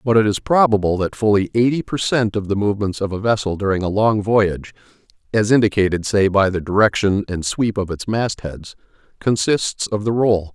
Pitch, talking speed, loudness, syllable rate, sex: 105 Hz, 190 wpm, -18 LUFS, 5.3 syllables/s, male